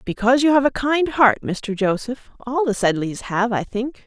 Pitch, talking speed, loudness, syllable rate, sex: 235 Hz, 205 wpm, -19 LUFS, 4.7 syllables/s, female